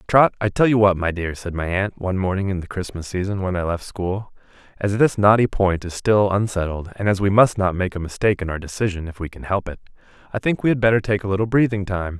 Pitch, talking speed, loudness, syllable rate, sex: 100 Hz, 260 wpm, -20 LUFS, 6.1 syllables/s, male